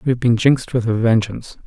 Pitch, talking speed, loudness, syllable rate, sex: 120 Hz, 250 wpm, -17 LUFS, 6.6 syllables/s, male